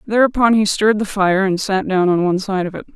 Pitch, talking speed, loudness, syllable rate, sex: 200 Hz, 265 wpm, -16 LUFS, 6.2 syllables/s, female